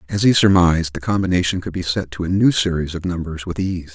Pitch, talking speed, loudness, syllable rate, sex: 90 Hz, 245 wpm, -19 LUFS, 6.1 syllables/s, male